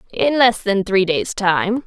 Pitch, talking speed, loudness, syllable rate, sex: 200 Hz, 195 wpm, -17 LUFS, 4.3 syllables/s, female